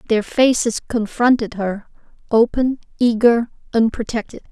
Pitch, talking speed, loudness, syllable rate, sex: 230 Hz, 95 wpm, -18 LUFS, 4.5 syllables/s, female